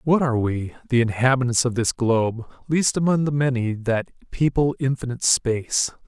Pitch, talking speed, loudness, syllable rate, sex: 130 Hz, 160 wpm, -21 LUFS, 5.3 syllables/s, male